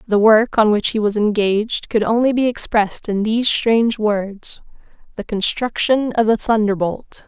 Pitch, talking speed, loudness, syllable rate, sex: 220 Hz, 155 wpm, -17 LUFS, 4.7 syllables/s, female